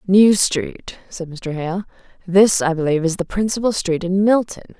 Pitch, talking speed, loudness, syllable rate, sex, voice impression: 185 Hz, 175 wpm, -18 LUFS, 4.7 syllables/s, female, feminine, adult-like, slightly intellectual, calm, sweet